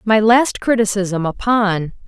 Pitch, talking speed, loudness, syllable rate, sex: 210 Hz, 115 wpm, -16 LUFS, 3.8 syllables/s, female